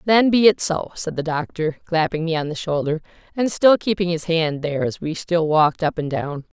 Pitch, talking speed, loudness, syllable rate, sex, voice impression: 165 Hz, 230 wpm, -20 LUFS, 5.2 syllables/s, female, feminine, middle-aged, tensed, powerful, hard, clear, slightly halting, intellectual, slightly friendly, lively, slightly strict